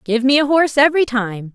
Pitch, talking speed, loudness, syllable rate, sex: 260 Hz, 235 wpm, -15 LUFS, 6.2 syllables/s, female